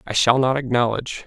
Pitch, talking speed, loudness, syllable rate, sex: 125 Hz, 190 wpm, -19 LUFS, 6.1 syllables/s, male